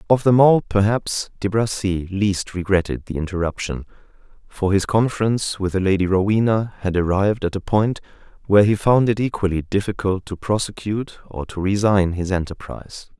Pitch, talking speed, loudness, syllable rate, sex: 100 Hz, 160 wpm, -20 LUFS, 5.4 syllables/s, male